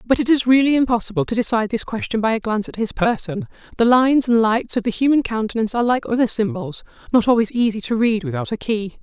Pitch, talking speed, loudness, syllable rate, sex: 235 Hz, 225 wpm, -19 LUFS, 6.6 syllables/s, female